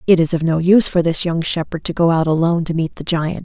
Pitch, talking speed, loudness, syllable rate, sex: 165 Hz, 295 wpm, -16 LUFS, 6.3 syllables/s, female